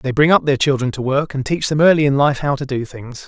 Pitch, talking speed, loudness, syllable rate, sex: 140 Hz, 310 wpm, -16 LUFS, 5.9 syllables/s, male